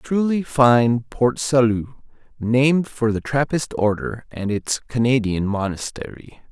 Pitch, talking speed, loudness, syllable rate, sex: 120 Hz, 120 wpm, -20 LUFS, 4.0 syllables/s, male